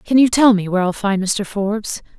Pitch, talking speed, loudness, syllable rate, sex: 210 Hz, 245 wpm, -17 LUFS, 5.5 syllables/s, female